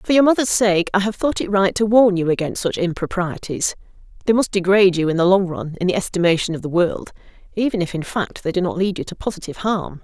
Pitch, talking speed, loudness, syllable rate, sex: 185 Hz, 245 wpm, -19 LUFS, 6.2 syllables/s, female